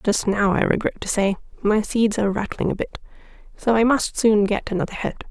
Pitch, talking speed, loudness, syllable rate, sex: 210 Hz, 215 wpm, -21 LUFS, 5.6 syllables/s, female